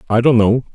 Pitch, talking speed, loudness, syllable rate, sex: 115 Hz, 240 wpm, -14 LUFS, 5.9 syllables/s, male